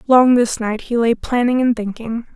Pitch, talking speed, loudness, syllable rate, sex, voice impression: 235 Hz, 205 wpm, -17 LUFS, 4.6 syllables/s, female, feminine, slightly adult-like, slightly soft, slightly cute, slightly intellectual, calm, slightly kind